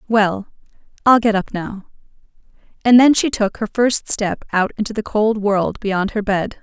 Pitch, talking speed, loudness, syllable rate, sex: 210 Hz, 170 wpm, -17 LUFS, 4.4 syllables/s, female